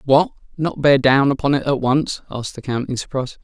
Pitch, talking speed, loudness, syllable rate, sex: 135 Hz, 225 wpm, -19 LUFS, 5.7 syllables/s, male